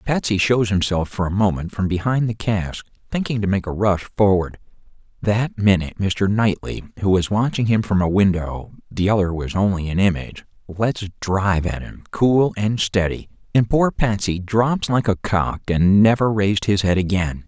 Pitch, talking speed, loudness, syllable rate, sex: 100 Hz, 180 wpm, -20 LUFS, 4.4 syllables/s, male